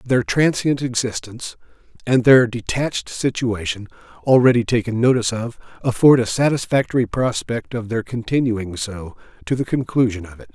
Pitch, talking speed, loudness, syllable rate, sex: 115 Hz, 135 wpm, -19 LUFS, 5.2 syllables/s, male